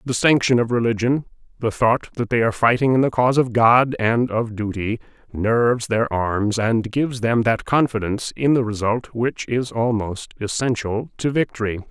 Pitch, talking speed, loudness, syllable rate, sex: 115 Hz, 170 wpm, -20 LUFS, 4.9 syllables/s, male